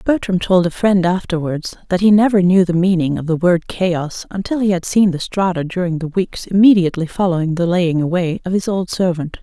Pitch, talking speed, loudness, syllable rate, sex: 180 Hz, 210 wpm, -16 LUFS, 5.4 syllables/s, female